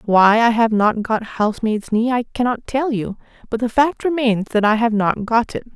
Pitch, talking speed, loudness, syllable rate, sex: 230 Hz, 220 wpm, -18 LUFS, 4.9 syllables/s, female